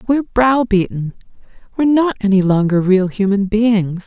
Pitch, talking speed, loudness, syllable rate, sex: 210 Hz, 135 wpm, -15 LUFS, 5.0 syllables/s, female